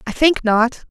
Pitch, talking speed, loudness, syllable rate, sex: 250 Hz, 200 wpm, -16 LUFS, 4.3 syllables/s, female